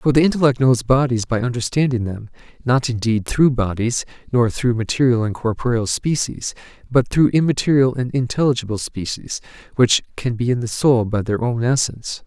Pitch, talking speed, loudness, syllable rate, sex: 125 Hz, 165 wpm, -19 LUFS, 5.3 syllables/s, male